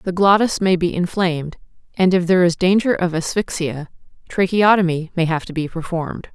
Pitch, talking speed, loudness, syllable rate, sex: 175 Hz, 170 wpm, -18 LUFS, 5.4 syllables/s, female